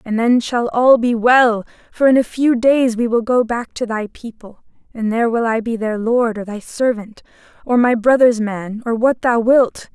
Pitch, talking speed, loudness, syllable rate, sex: 235 Hz, 215 wpm, -16 LUFS, 4.5 syllables/s, female